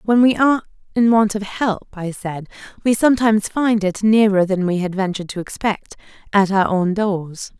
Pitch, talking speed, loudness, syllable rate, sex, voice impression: 205 Hz, 180 wpm, -18 LUFS, 5.0 syllables/s, female, feminine, adult-like, tensed, powerful, bright, clear, intellectual, calm, friendly, lively, slightly strict